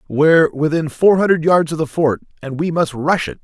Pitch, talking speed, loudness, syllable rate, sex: 155 Hz, 225 wpm, -16 LUFS, 5.3 syllables/s, male